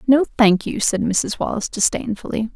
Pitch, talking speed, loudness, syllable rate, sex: 225 Hz, 165 wpm, -19 LUFS, 5.3 syllables/s, female